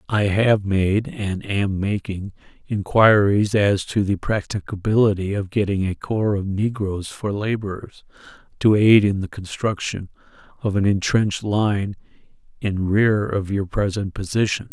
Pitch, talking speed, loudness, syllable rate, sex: 100 Hz, 140 wpm, -21 LUFS, 4.3 syllables/s, male